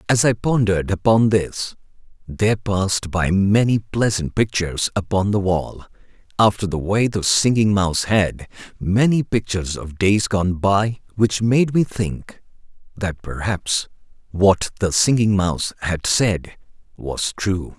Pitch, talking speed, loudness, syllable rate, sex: 100 Hz, 140 wpm, -19 LUFS, 4.1 syllables/s, male